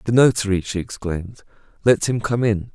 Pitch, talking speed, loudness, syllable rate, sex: 105 Hz, 175 wpm, -20 LUFS, 5.5 syllables/s, male